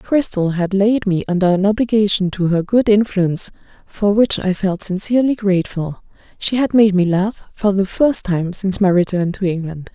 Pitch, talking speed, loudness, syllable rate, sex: 195 Hz, 180 wpm, -17 LUFS, 5.1 syllables/s, female